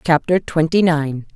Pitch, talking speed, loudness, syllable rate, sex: 160 Hz, 135 wpm, -17 LUFS, 4.3 syllables/s, female